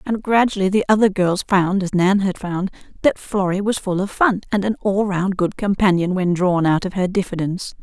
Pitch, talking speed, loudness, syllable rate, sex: 190 Hz, 215 wpm, -19 LUFS, 5.2 syllables/s, female